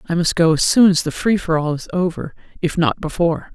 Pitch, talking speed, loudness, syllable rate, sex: 165 Hz, 255 wpm, -17 LUFS, 5.9 syllables/s, female